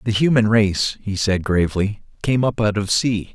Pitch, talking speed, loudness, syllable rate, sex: 105 Hz, 195 wpm, -19 LUFS, 4.8 syllables/s, male